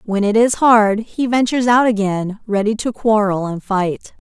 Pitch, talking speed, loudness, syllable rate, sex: 215 Hz, 180 wpm, -16 LUFS, 4.5 syllables/s, female